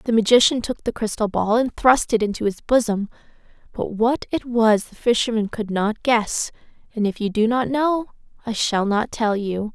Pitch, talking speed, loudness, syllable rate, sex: 225 Hz, 195 wpm, -21 LUFS, 4.8 syllables/s, female